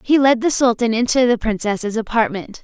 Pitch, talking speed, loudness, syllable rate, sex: 230 Hz, 180 wpm, -17 LUFS, 5.1 syllables/s, female